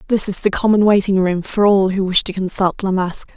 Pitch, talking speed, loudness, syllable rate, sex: 195 Hz, 250 wpm, -16 LUFS, 5.5 syllables/s, female